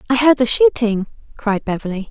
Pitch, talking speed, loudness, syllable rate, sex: 215 Hz, 170 wpm, -17 LUFS, 5.6 syllables/s, female